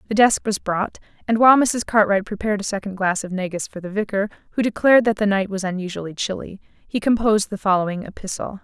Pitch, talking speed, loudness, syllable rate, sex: 205 Hz, 210 wpm, -20 LUFS, 6.4 syllables/s, female